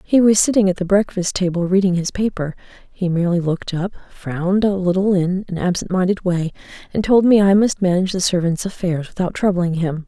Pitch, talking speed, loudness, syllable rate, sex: 185 Hz, 205 wpm, -18 LUFS, 5.7 syllables/s, female